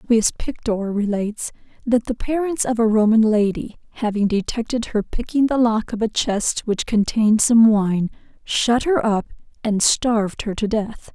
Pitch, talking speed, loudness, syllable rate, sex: 225 Hz, 165 wpm, -19 LUFS, 4.6 syllables/s, female